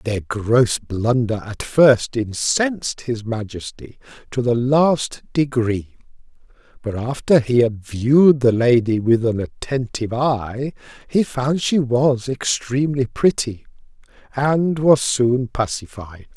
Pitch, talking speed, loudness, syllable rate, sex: 125 Hz, 120 wpm, -19 LUFS, 3.5 syllables/s, male